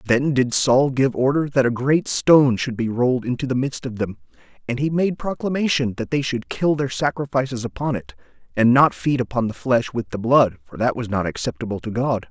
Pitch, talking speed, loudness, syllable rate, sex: 125 Hz, 220 wpm, -20 LUFS, 5.4 syllables/s, male